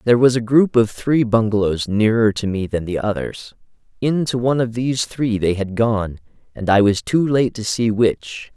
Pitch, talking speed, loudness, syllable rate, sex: 115 Hz, 205 wpm, -18 LUFS, 4.9 syllables/s, male